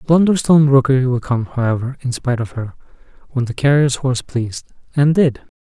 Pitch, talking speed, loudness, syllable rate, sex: 130 Hz, 160 wpm, -17 LUFS, 6.0 syllables/s, male